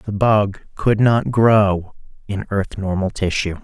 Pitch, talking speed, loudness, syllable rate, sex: 100 Hz, 150 wpm, -18 LUFS, 3.5 syllables/s, male